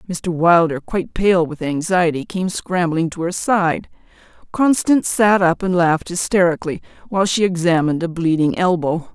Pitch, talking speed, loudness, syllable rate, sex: 175 Hz, 150 wpm, -18 LUFS, 5.1 syllables/s, female